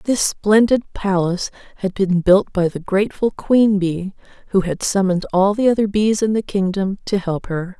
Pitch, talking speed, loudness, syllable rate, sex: 195 Hz, 185 wpm, -18 LUFS, 4.8 syllables/s, female